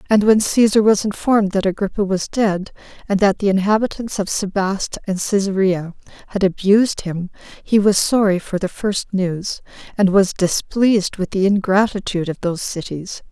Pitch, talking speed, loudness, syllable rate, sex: 195 Hz, 160 wpm, -18 LUFS, 5.1 syllables/s, female